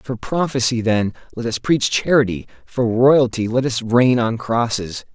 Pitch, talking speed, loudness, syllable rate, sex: 120 Hz, 165 wpm, -18 LUFS, 4.3 syllables/s, male